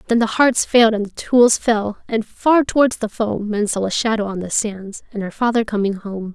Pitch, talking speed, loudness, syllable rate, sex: 220 Hz, 235 wpm, -18 LUFS, 5.0 syllables/s, female